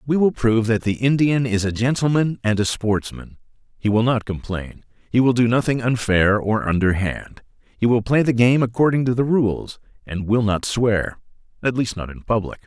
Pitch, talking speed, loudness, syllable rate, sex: 115 Hz, 190 wpm, -20 LUFS, 5.0 syllables/s, male